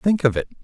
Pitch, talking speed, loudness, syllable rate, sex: 145 Hz, 285 wpm, -20 LUFS, 6.5 syllables/s, male